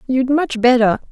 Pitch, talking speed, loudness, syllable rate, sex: 250 Hz, 160 wpm, -15 LUFS, 4.6 syllables/s, female